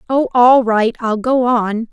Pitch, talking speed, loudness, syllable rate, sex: 235 Hz, 190 wpm, -14 LUFS, 3.7 syllables/s, female